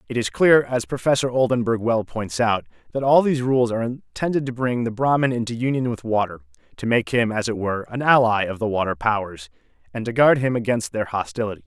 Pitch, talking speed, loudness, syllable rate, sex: 115 Hz, 215 wpm, -21 LUFS, 5.9 syllables/s, male